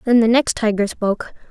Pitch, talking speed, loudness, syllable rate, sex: 225 Hz, 200 wpm, -18 LUFS, 5.7 syllables/s, female